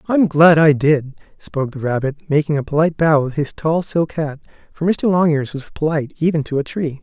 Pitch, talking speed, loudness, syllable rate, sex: 150 Hz, 220 wpm, -17 LUFS, 5.6 syllables/s, male